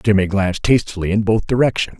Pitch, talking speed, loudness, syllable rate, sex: 105 Hz, 180 wpm, -17 LUFS, 6.2 syllables/s, male